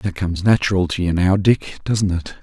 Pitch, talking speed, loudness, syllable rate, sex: 95 Hz, 225 wpm, -18 LUFS, 5.3 syllables/s, male